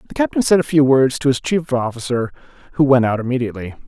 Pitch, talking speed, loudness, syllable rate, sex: 135 Hz, 215 wpm, -17 LUFS, 6.6 syllables/s, male